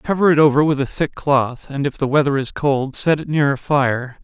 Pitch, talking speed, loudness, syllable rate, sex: 140 Hz, 255 wpm, -18 LUFS, 5.0 syllables/s, male